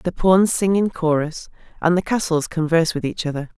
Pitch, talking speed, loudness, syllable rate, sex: 170 Hz, 200 wpm, -19 LUFS, 5.3 syllables/s, female